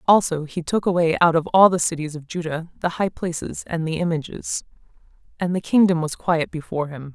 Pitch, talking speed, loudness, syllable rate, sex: 165 Hz, 200 wpm, -21 LUFS, 5.7 syllables/s, female